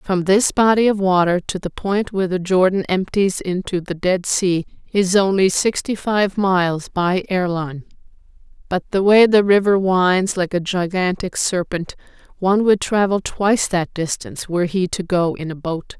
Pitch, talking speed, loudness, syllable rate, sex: 185 Hz, 175 wpm, -18 LUFS, 4.7 syllables/s, female